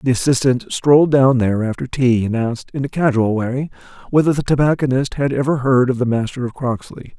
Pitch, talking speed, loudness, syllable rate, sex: 130 Hz, 200 wpm, -17 LUFS, 5.8 syllables/s, male